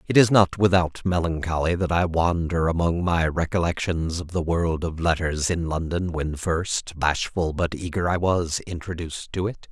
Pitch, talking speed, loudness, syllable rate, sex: 85 Hz, 175 wpm, -24 LUFS, 4.6 syllables/s, male